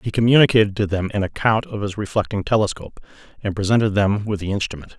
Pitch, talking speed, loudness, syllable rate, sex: 105 Hz, 195 wpm, -20 LUFS, 6.7 syllables/s, male